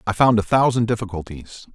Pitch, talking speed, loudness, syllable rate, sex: 110 Hz, 170 wpm, -19 LUFS, 5.7 syllables/s, male